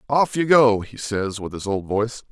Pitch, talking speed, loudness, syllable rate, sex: 115 Hz, 235 wpm, -21 LUFS, 4.8 syllables/s, male